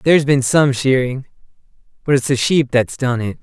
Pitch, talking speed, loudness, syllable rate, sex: 130 Hz, 195 wpm, -16 LUFS, 5.1 syllables/s, male